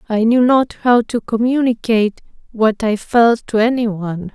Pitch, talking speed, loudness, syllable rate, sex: 225 Hz, 150 wpm, -16 LUFS, 4.4 syllables/s, female